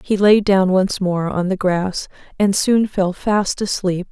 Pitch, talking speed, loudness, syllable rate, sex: 190 Hz, 190 wpm, -17 LUFS, 3.8 syllables/s, female